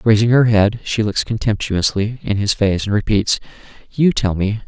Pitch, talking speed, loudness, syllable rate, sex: 110 Hz, 180 wpm, -17 LUFS, 4.8 syllables/s, male